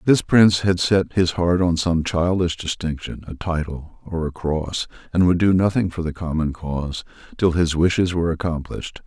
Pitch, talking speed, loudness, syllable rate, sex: 85 Hz, 185 wpm, -21 LUFS, 5.0 syllables/s, male